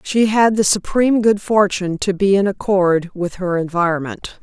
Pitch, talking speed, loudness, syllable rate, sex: 195 Hz, 175 wpm, -17 LUFS, 4.9 syllables/s, female